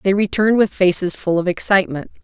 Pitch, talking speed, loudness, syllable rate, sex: 190 Hz, 190 wpm, -17 LUFS, 6.4 syllables/s, female